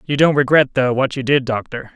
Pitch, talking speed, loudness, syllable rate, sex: 135 Hz, 245 wpm, -16 LUFS, 5.4 syllables/s, male